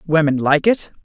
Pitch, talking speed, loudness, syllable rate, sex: 160 Hz, 175 wpm, -16 LUFS, 4.8 syllables/s, female